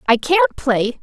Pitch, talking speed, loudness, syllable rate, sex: 250 Hz, 175 wpm, -16 LUFS, 4.0 syllables/s, female